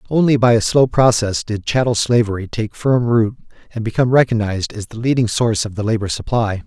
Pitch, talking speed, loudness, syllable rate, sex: 115 Hz, 200 wpm, -17 LUFS, 5.8 syllables/s, male